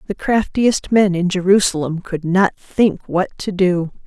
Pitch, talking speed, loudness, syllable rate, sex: 185 Hz, 160 wpm, -17 LUFS, 4.2 syllables/s, female